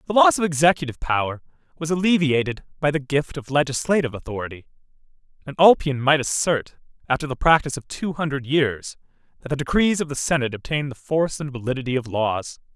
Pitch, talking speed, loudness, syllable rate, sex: 140 Hz, 175 wpm, -21 LUFS, 6.4 syllables/s, male